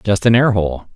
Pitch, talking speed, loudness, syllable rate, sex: 105 Hz, 250 wpm, -15 LUFS, 5.1 syllables/s, male